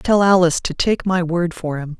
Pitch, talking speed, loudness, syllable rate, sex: 175 Hz, 240 wpm, -18 LUFS, 5.1 syllables/s, female